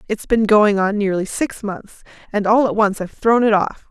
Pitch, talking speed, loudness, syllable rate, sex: 210 Hz, 230 wpm, -17 LUFS, 5.0 syllables/s, female